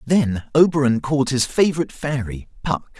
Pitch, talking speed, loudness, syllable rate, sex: 135 Hz, 140 wpm, -20 LUFS, 5.2 syllables/s, male